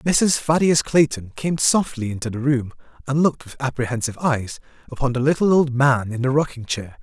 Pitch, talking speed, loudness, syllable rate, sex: 135 Hz, 190 wpm, -20 LUFS, 5.5 syllables/s, male